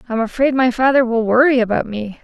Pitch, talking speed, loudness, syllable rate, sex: 245 Hz, 215 wpm, -16 LUFS, 5.9 syllables/s, female